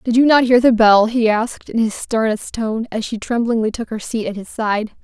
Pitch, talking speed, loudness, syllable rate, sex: 225 Hz, 250 wpm, -17 LUFS, 5.2 syllables/s, female